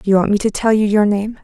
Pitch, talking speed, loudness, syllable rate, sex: 210 Hz, 375 wpm, -15 LUFS, 6.5 syllables/s, female